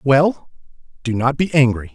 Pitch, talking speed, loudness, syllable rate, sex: 135 Hz, 155 wpm, -17 LUFS, 4.4 syllables/s, male